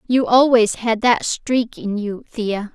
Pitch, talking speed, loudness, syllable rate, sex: 225 Hz, 175 wpm, -18 LUFS, 3.6 syllables/s, female